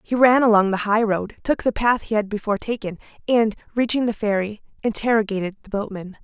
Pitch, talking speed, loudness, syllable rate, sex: 215 Hz, 195 wpm, -21 LUFS, 5.9 syllables/s, female